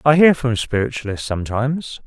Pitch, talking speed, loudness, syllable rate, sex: 125 Hz, 145 wpm, -19 LUFS, 5.6 syllables/s, male